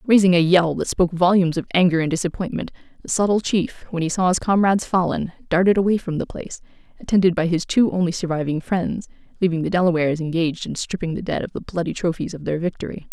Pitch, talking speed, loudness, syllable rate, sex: 175 Hz, 210 wpm, -20 LUFS, 6.6 syllables/s, female